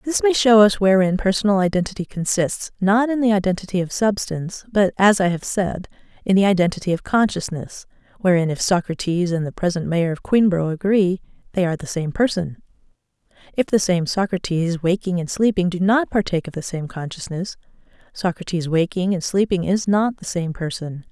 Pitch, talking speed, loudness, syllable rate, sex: 185 Hz, 175 wpm, -20 LUFS, 5.5 syllables/s, female